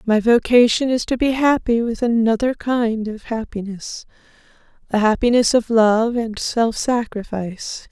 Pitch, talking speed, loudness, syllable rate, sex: 230 Hz, 135 wpm, -18 LUFS, 4.3 syllables/s, female